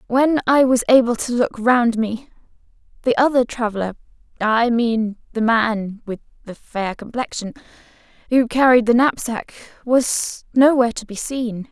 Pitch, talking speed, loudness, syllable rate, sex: 235 Hz, 135 wpm, -18 LUFS, 4.4 syllables/s, female